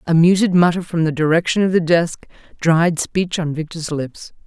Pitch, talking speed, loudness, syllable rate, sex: 170 Hz, 190 wpm, -17 LUFS, 4.9 syllables/s, female